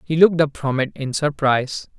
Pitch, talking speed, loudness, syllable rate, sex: 145 Hz, 210 wpm, -19 LUFS, 5.6 syllables/s, male